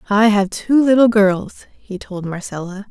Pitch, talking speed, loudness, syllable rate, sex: 205 Hz, 165 wpm, -16 LUFS, 4.2 syllables/s, female